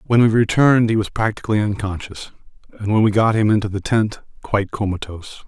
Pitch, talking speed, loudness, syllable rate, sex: 105 Hz, 185 wpm, -18 LUFS, 6.4 syllables/s, male